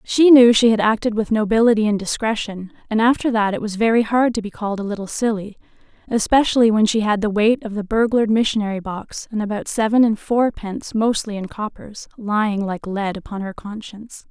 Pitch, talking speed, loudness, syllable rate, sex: 215 Hz, 195 wpm, -19 LUFS, 5.7 syllables/s, female